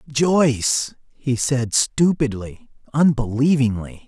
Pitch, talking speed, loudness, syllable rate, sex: 135 Hz, 75 wpm, -19 LUFS, 3.5 syllables/s, male